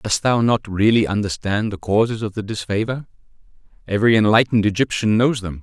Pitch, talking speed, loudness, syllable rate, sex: 110 Hz, 160 wpm, -19 LUFS, 5.8 syllables/s, male